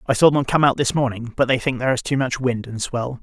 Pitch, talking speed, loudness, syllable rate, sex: 125 Hz, 315 wpm, -20 LUFS, 6.2 syllables/s, male